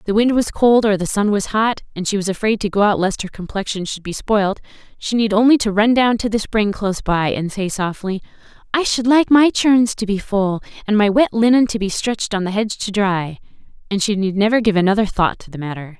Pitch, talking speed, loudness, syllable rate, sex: 205 Hz, 250 wpm, -17 LUFS, 5.7 syllables/s, female